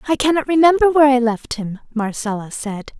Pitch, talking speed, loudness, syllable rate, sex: 260 Hz, 180 wpm, -17 LUFS, 5.7 syllables/s, female